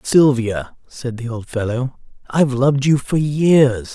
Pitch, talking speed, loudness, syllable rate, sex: 130 Hz, 150 wpm, -17 LUFS, 4.1 syllables/s, male